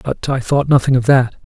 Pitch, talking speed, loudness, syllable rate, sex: 130 Hz, 230 wpm, -15 LUFS, 5.4 syllables/s, male